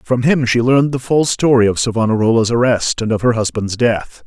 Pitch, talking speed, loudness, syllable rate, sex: 120 Hz, 210 wpm, -15 LUFS, 5.5 syllables/s, male